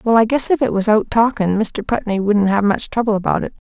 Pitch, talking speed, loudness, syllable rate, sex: 215 Hz, 260 wpm, -17 LUFS, 5.5 syllables/s, female